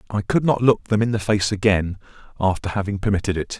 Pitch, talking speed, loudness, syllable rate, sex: 105 Hz, 215 wpm, -21 LUFS, 6.1 syllables/s, male